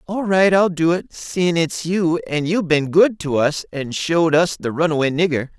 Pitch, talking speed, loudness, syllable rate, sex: 165 Hz, 215 wpm, -18 LUFS, 4.7 syllables/s, male